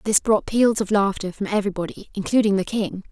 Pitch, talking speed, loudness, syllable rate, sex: 205 Hz, 195 wpm, -21 LUFS, 5.9 syllables/s, female